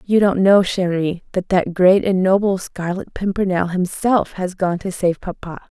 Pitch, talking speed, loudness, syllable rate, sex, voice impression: 185 Hz, 175 wpm, -18 LUFS, 4.4 syllables/s, female, very feminine, adult-like, slightly thin, tensed, slightly weak, slightly bright, soft, clear, fluent, slightly raspy, cute, intellectual, slightly refreshing, sincere, very calm, friendly, very reassuring, unique, very elegant, sweet, slightly lively, kind, modest, light